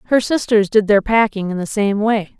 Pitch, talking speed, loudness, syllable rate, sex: 210 Hz, 225 wpm, -16 LUFS, 5.2 syllables/s, female